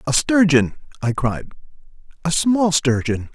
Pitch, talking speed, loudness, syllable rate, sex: 155 Hz, 125 wpm, -19 LUFS, 4.3 syllables/s, male